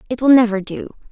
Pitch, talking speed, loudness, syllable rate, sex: 230 Hz, 215 wpm, -15 LUFS, 6.4 syllables/s, female